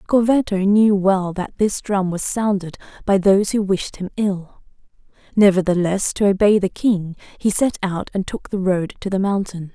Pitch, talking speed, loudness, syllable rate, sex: 195 Hz, 180 wpm, -19 LUFS, 4.6 syllables/s, female